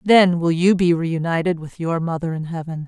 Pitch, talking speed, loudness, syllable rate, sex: 170 Hz, 210 wpm, -20 LUFS, 5.1 syllables/s, female